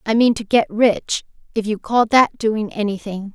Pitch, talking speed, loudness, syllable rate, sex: 220 Hz, 195 wpm, -18 LUFS, 4.6 syllables/s, female